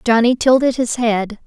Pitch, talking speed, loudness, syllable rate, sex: 235 Hz, 165 wpm, -16 LUFS, 4.5 syllables/s, female